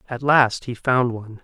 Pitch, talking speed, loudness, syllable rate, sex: 125 Hz, 210 wpm, -20 LUFS, 4.8 syllables/s, male